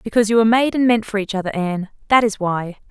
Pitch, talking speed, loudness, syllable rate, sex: 210 Hz, 250 wpm, -18 LUFS, 7.1 syllables/s, female